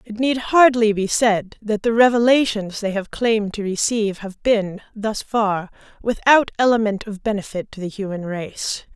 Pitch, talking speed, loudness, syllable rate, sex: 215 Hz, 170 wpm, -19 LUFS, 4.6 syllables/s, female